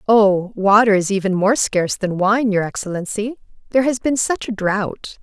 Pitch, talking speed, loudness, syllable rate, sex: 210 Hz, 170 wpm, -18 LUFS, 4.9 syllables/s, female